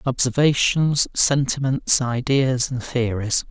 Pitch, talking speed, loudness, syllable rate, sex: 130 Hz, 85 wpm, -19 LUFS, 3.6 syllables/s, male